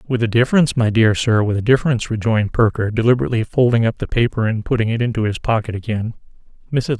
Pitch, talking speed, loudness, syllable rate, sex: 115 Hz, 205 wpm, -17 LUFS, 6.3 syllables/s, male